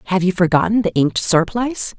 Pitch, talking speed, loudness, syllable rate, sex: 180 Hz, 180 wpm, -17 LUFS, 6.4 syllables/s, female